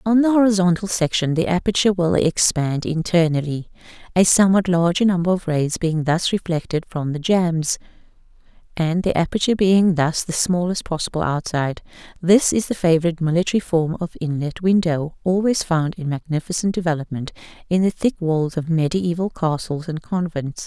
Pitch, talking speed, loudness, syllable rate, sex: 170 Hz, 155 wpm, -20 LUFS, 5.3 syllables/s, female